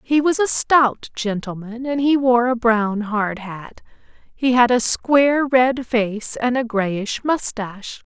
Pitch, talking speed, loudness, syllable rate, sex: 240 Hz, 165 wpm, -18 LUFS, 3.7 syllables/s, female